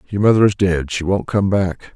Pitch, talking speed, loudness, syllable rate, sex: 95 Hz, 245 wpm, -17 LUFS, 5.2 syllables/s, male